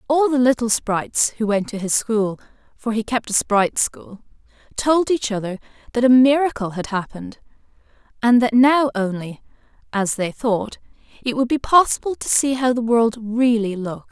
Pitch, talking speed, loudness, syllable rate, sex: 230 Hz, 165 wpm, -19 LUFS, 5.0 syllables/s, female